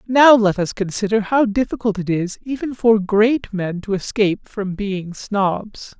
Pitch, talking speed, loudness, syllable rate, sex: 210 Hz, 170 wpm, -18 LUFS, 4.1 syllables/s, male